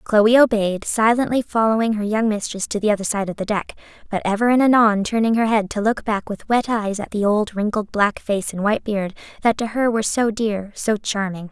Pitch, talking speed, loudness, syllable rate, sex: 215 Hz, 230 wpm, -20 LUFS, 5.4 syllables/s, female